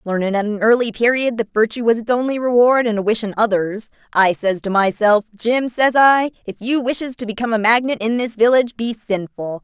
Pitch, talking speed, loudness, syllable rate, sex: 225 Hz, 220 wpm, -17 LUFS, 5.6 syllables/s, female